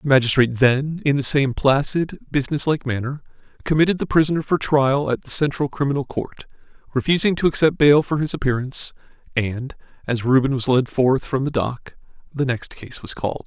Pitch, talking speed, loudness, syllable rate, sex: 140 Hz, 185 wpm, -20 LUFS, 5.6 syllables/s, male